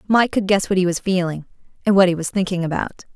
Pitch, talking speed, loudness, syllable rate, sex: 185 Hz, 250 wpm, -19 LUFS, 6.8 syllables/s, female